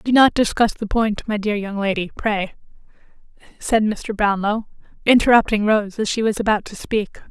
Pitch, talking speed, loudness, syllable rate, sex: 215 Hz, 170 wpm, -19 LUFS, 4.9 syllables/s, female